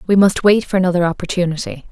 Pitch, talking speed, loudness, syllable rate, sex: 180 Hz, 190 wpm, -16 LUFS, 6.8 syllables/s, female